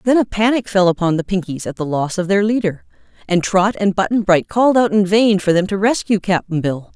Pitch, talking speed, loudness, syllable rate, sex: 195 Hz, 240 wpm, -16 LUFS, 5.5 syllables/s, female